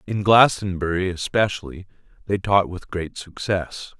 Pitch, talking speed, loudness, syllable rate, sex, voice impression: 95 Hz, 120 wpm, -21 LUFS, 4.4 syllables/s, male, very masculine, very adult-like, middle-aged, very thick, tensed, very powerful, slightly bright, slightly hard, slightly muffled, fluent, slightly raspy, cool, slightly intellectual, sincere, very calm, mature, friendly, reassuring, very wild, slightly sweet, kind, slightly intense